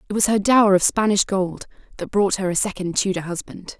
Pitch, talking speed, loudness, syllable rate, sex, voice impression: 195 Hz, 220 wpm, -20 LUFS, 5.8 syllables/s, female, feminine, slightly young, tensed, powerful, hard, clear, fluent, intellectual, lively, sharp